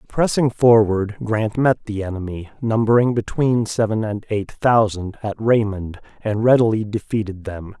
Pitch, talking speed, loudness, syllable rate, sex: 110 Hz, 140 wpm, -19 LUFS, 4.5 syllables/s, male